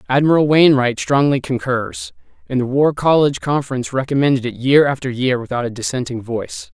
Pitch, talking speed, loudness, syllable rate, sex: 135 Hz, 160 wpm, -17 LUFS, 5.8 syllables/s, male